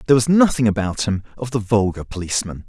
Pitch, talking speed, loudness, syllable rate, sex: 110 Hz, 200 wpm, -19 LUFS, 6.8 syllables/s, male